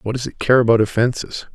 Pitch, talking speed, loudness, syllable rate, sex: 115 Hz, 235 wpm, -17 LUFS, 6.2 syllables/s, male